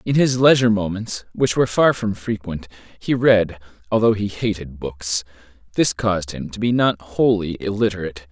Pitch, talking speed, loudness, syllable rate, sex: 100 Hz, 165 wpm, -20 LUFS, 5.2 syllables/s, male